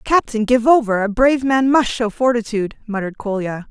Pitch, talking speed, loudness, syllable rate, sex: 230 Hz, 180 wpm, -17 LUFS, 5.7 syllables/s, female